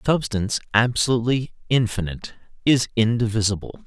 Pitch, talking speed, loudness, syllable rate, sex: 115 Hz, 80 wpm, -22 LUFS, 5.8 syllables/s, male